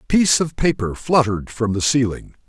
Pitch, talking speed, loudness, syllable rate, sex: 125 Hz, 195 wpm, -19 LUFS, 5.6 syllables/s, male